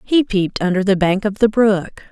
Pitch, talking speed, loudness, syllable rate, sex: 200 Hz, 225 wpm, -16 LUFS, 5.2 syllables/s, female